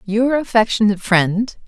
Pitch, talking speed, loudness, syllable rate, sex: 215 Hz, 110 wpm, -16 LUFS, 4.6 syllables/s, female